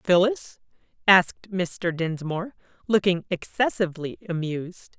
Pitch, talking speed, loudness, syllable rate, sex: 185 Hz, 85 wpm, -24 LUFS, 4.6 syllables/s, female